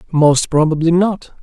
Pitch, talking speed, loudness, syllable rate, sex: 165 Hz, 125 wpm, -14 LUFS, 4.3 syllables/s, male